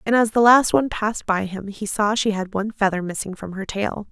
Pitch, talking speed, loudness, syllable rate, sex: 205 Hz, 265 wpm, -21 LUFS, 5.8 syllables/s, female